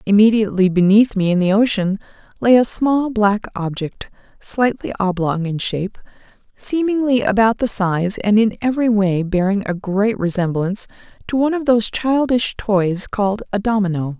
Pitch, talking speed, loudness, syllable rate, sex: 210 Hz, 150 wpm, -17 LUFS, 5.0 syllables/s, female